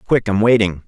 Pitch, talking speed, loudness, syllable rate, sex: 105 Hz, 275 wpm, -15 LUFS, 6.9 syllables/s, male